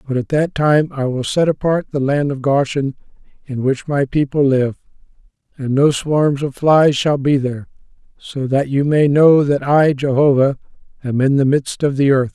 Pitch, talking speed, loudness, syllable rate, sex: 140 Hz, 195 wpm, -16 LUFS, 4.7 syllables/s, male